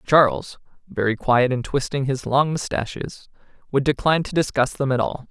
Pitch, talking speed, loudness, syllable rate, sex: 135 Hz, 170 wpm, -21 LUFS, 5.2 syllables/s, male